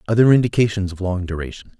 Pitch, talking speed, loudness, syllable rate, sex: 100 Hz, 165 wpm, -19 LUFS, 6.8 syllables/s, male